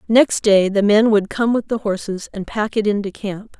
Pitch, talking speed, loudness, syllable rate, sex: 210 Hz, 250 wpm, -18 LUFS, 4.7 syllables/s, female